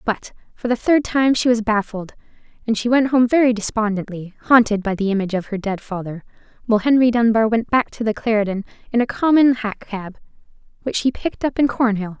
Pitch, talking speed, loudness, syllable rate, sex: 225 Hz, 200 wpm, -19 LUFS, 5.9 syllables/s, female